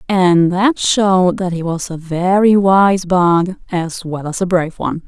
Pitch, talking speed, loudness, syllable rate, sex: 180 Hz, 190 wpm, -15 LUFS, 4.2 syllables/s, female